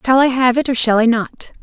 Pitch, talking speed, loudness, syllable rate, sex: 245 Hz, 295 wpm, -14 LUFS, 5.6 syllables/s, female